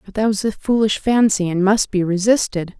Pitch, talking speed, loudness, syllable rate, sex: 205 Hz, 215 wpm, -17 LUFS, 5.2 syllables/s, female